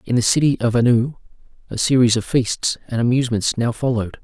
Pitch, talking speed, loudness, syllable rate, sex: 120 Hz, 185 wpm, -18 LUFS, 6.0 syllables/s, male